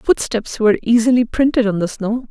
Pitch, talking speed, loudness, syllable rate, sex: 230 Hz, 180 wpm, -16 LUFS, 5.4 syllables/s, female